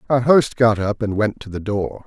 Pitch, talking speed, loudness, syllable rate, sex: 110 Hz, 260 wpm, -19 LUFS, 4.8 syllables/s, male